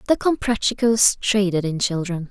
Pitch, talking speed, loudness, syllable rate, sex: 200 Hz, 130 wpm, -20 LUFS, 4.8 syllables/s, female